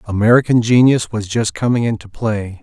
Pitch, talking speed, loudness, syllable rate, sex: 110 Hz, 160 wpm, -15 LUFS, 5.1 syllables/s, male